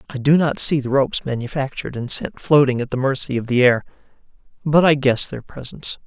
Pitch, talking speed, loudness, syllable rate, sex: 135 Hz, 210 wpm, -19 LUFS, 5.9 syllables/s, male